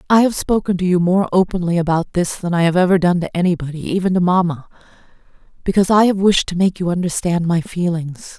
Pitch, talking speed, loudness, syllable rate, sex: 180 Hz, 210 wpm, -17 LUFS, 6.1 syllables/s, female